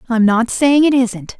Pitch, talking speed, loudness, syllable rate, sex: 240 Hz, 215 wpm, -14 LUFS, 4.1 syllables/s, female